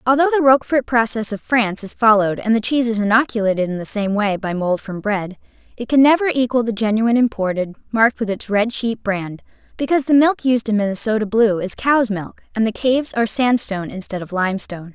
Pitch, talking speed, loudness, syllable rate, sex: 225 Hz, 210 wpm, -18 LUFS, 6.1 syllables/s, female